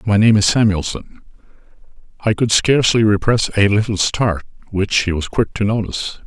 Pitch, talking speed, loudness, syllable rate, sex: 105 Hz, 165 wpm, -16 LUFS, 5.5 syllables/s, male